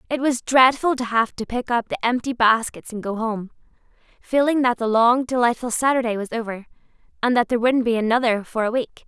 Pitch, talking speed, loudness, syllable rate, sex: 235 Hz, 205 wpm, -20 LUFS, 5.7 syllables/s, female